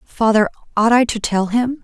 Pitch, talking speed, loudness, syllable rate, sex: 225 Hz, 195 wpm, -17 LUFS, 5.0 syllables/s, female